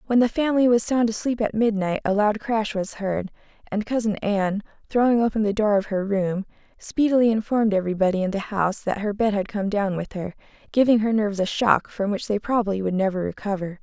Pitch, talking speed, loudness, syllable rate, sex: 210 Hz, 215 wpm, -23 LUFS, 5.9 syllables/s, female